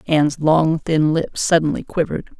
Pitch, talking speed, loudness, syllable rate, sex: 155 Hz, 150 wpm, -18 LUFS, 5.0 syllables/s, female